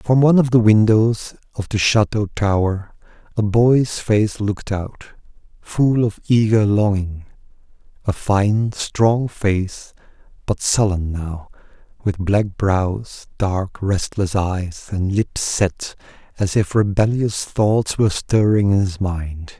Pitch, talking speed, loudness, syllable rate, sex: 100 Hz, 130 wpm, -18 LUFS, 3.5 syllables/s, male